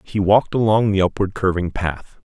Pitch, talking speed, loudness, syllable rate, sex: 100 Hz, 155 wpm, -18 LUFS, 5.2 syllables/s, male